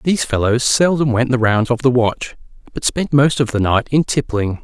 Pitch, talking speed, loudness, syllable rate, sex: 125 Hz, 220 wpm, -16 LUFS, 5.1 syllables/s, male